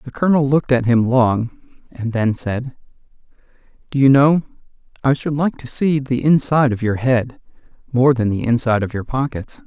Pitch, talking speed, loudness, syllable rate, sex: 125 Hz, 180 wpm, -17 LUFS, 5.3 syllables/s, male